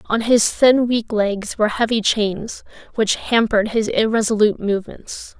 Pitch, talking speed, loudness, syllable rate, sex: 220 Hz, 145 wpm, -18 LUFS, 4.7 syllables/s, female